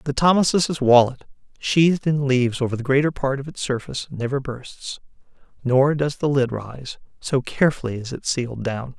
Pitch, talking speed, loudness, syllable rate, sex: 135 Hz, 175 wpm, -21 LUFS, 5.2 syllables/s, male